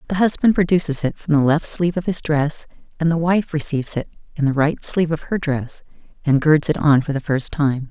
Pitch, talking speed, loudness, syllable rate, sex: 155 Hz, 235 wpm, -19 LUFS, 5.7 syllables/s, female